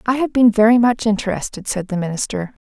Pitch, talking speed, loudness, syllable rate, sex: 220 Hz, 200 wpm, -17 LUFS, 6.1 syllables/s, female